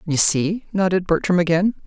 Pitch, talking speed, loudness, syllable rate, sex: 180 Hz, 160 wpm, -19 LUFS, 5.1 syllables/s, female